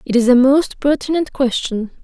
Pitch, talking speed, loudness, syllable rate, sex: 265 Hz, 175 wpm, -16 LUFS, 5.0 syllables/s, female